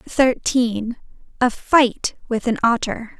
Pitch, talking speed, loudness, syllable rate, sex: 240 Hz, 115 wpm, -19 LUFS, 3.2 syllables/s, female